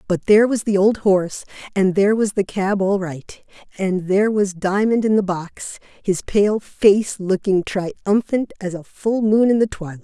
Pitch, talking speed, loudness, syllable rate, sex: 200 Hz, 190 wpm, -19 LUFS, 4.5 syllables/s, female